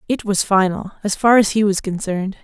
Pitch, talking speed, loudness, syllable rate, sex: 200 Hz, 220 wpm, -17 LUFS, 5.7 syllables/s, female